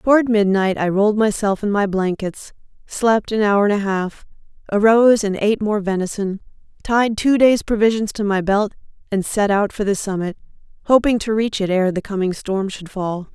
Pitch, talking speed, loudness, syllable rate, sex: 205 Hz, 190 wpm, -18 LUFS, 5.1 syllables/s, female